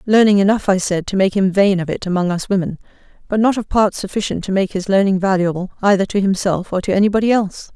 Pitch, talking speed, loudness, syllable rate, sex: 195 Hz, 240 wpm, -17 LUFS, 6.5 syllables/s, female